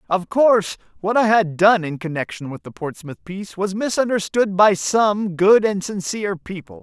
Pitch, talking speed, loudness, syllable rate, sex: 190 Hz, 175 wpm, -19 LUFS, 4.8 syllables/s, male